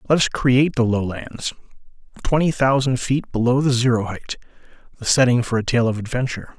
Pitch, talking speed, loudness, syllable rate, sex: 125 Hz, 155 wpm, -20 LUFS, 5.8 syllables/s, male